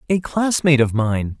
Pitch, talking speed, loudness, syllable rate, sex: 145 Hz, 170 wpm, -18 LUFS, 5.0 syllables/s, male